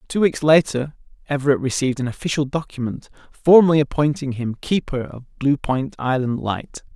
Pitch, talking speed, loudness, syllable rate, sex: 140 Hz, 145 wpm, -20 LUFS, 5.2 syllables/s, male